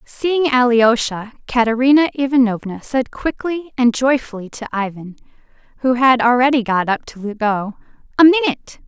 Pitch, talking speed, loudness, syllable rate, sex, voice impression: 250 Hz, 130 wpm, -16 LUFS, 4.8 syllables/s, female, very feminine, slightly young, adult-like, thin, tensed, slightly powerful, bright, hard, very clear, fluent, cute, slightly cool, intellectual, refreshing, slightly sincere, slightly calm, slightly friendly, reassuring, unique, elegant, slightly sweet, slightly lively, very kind